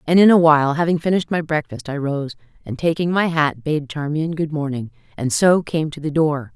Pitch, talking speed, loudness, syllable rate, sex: 155 Hz, 220 wpm, -19 LUFS, 5.4 syllables/s, female